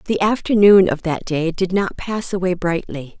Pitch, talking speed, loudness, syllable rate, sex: 185 Hz, 190 wpm, -18 LUFS, 4.6 syllables/s, female